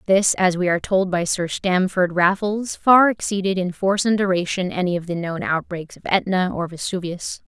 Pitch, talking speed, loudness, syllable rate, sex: 185 Hz, 190 wpm, -20 LUFS, 5.1 syllables/s, female